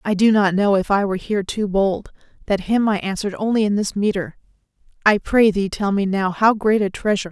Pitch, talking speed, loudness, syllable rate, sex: 200 Hz, 230 wpm, -19 LUFS, 5.8 syllables/s, female